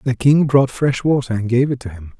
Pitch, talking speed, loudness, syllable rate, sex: 125 Hz, 275 wpm, -17 LUFS, 5.4 syllables/s, male